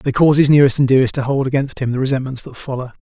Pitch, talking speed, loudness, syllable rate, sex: 130 Hz, 275 wpm, -16 LUFS, 7.9 syllables/s, male